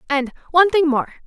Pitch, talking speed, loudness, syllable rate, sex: 305 Hz, 140 wpm, -18 LUFS, 6.3 syllables/s, female